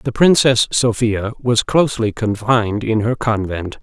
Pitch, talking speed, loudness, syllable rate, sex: 115 Hz, 140 wpm, -16 LUFS, 4.4 syllables/s, male